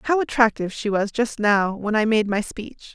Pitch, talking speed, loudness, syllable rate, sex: 220 Hz, 225 wpm, -21 LUFS, 5.1 syllables/s, female